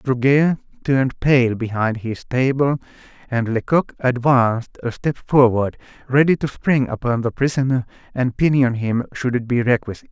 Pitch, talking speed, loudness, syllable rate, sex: 125 Hz, 150 wpm, -19 LUFS, 4.8 syllables/s, male